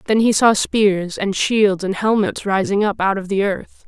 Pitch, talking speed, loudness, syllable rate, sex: 200 Hz, 215 wpm, -17 LUFS, 4.3 syllables/s, female